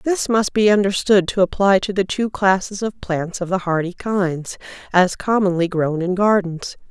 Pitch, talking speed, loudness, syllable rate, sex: 190 Hz, 180 wpm, -18 LUFS, 4.6 syllables/s, female